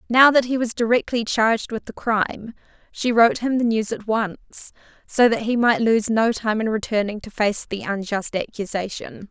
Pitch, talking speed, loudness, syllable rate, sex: 225 Hz, 195 wpm, -21 LUFS, 5.1 syllables/s, female